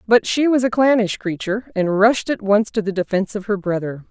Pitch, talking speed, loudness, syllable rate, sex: 210 Hz, 235 wpm, -19 LUFS, 5.7 syllables/s, female